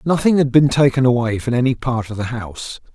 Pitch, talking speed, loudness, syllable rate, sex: 125 Hz, 225 wpm, -17 LUFS, 5.9 syllables/s, male